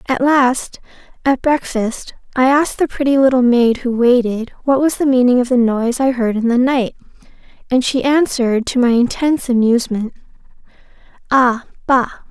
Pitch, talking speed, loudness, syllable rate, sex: 250 Hz, 160 wpm, -15 LUFS, 5.3 syllables/s, female